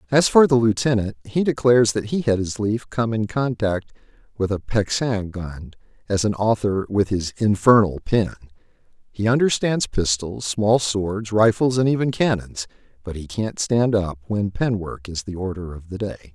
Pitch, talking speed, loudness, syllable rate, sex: 105 Hz, 175 wpm, -21 LUFS, 4.7 syllables/s, male